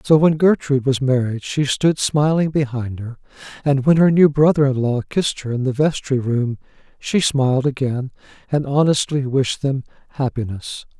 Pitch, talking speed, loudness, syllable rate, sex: 135 Hz, 170 wpm, -18 LUFS, 4.9 syllables/s, male